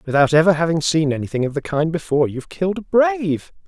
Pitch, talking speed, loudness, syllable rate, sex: 155 Hz, 210 wpm, -19 LUFS, 6.7 syllables/s, male